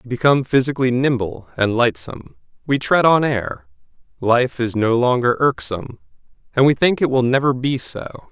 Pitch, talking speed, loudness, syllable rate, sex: 125 Hz, 165 wpm, -18 LUFS, 5.2 syllables/s, male